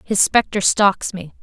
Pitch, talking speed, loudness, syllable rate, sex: 195 Hz, 170 wpm, -16 LUFS, 3.9 syllables/s, female